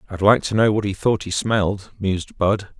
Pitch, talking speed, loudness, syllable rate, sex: 100 Hz, 235 wpm, -20 LUFS, 5.3 syllables/s, male